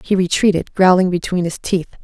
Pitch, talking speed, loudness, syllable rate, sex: 180 Hz, 175 wpm, -16 LUFS, 5.6 syllables/s, female